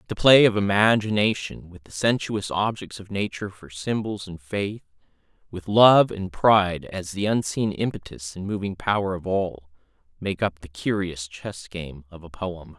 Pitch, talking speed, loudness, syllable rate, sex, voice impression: 95 Hz, 165 wpm, -23 LUFS, 4.6 syllables/s, male, masculine, adult-like, tensed, powerful, bright, clear, slightly nasal, cool, intellectual, calm, mature, reassuring, wild, lively, slightly strict